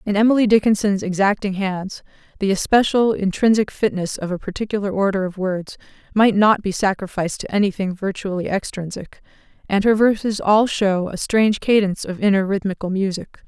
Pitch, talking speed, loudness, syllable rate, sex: 200 Hz, 155 wpm, -19 LUFS, 5.5 syllables/s, female